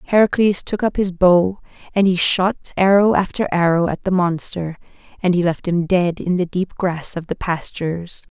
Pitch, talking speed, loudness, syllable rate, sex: 180 Hz, 185 wpm, -18 LUFS, 4.7 syllables/s, female